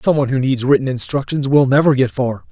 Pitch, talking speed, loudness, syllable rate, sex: 130 Hz, 215 wpm, -16 LUFS, 6.3 syllables/s, male